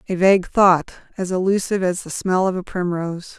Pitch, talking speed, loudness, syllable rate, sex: 185 Hz, 195 wpm, -19 LUFS, 5.7 syllables/s, female